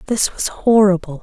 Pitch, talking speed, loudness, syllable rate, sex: 195 Hz, 145 wpm, -16 LUFS, 4.8 syllables/s, female